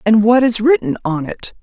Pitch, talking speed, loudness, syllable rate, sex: 220 Hz, 220 wpm, -14 LUFS, 5.0 syllables/s, female